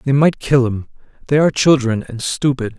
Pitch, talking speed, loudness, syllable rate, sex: 130 Hz, 195 wpm, -16 LUFS, 5.1 syllables/s, male